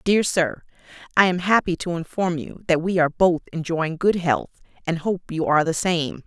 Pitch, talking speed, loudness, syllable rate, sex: 170 Hz, 190 wpm, -22 LUFS, 5.1 syllables/s, female